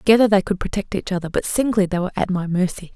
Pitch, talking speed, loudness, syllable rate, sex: 190 Hz, 265 wpm, -20 LUFS, 7.2 syllables/s, female